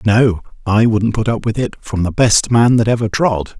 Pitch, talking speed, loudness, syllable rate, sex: 110 Hz, 235 wpm, -15 LUFS, 4.7 syllables/s, male